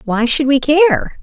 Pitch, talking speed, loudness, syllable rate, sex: 290 Hz, 195 wpm, -13 LUFS, 5.7 syllables/s, female